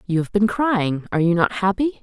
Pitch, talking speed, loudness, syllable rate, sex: 200 Hz, 205 wpm, -20 LUFS, 5.4 syllables/s, female